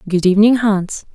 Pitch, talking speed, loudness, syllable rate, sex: 205 Hz, 155 wpm, -14 LUFS, 5.6 syllables/s, female